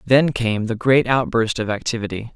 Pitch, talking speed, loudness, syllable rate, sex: 120 Hz, 180 wpm, -19 LUFS, 4.9 syllables/s, male